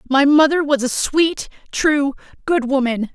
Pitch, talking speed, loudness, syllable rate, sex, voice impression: 280 Hz, 155 wpm, -17 LUFS, 4.1 syllables/s, female, very feminine, middle-aged, thin, tensed, powerful, slightly dark, slightly hard, clear, fluent, slightly raspy, slightly cool, intellectual, refreshing, slightly sincere, calm, slightly friendly, slightly reassuring, unique, slightly elegant, slightly wild, slightly sweet, lively, slightly strict, slightly intense, sharp, slightly light